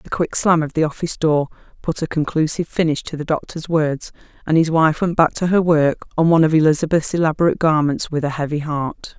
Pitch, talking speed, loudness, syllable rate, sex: 155 Hz, 215 wpm, -18 LUFS, 5.9 syllables/s, female